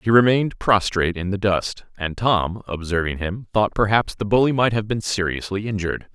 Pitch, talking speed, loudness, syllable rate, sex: 100 Hz, 185 wpm, -21 LUFS, 5.3 syllables/s, male